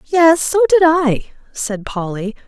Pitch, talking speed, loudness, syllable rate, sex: 285 Hz, 145 wpm, -15 LUFS, 3.5 syllables/s, female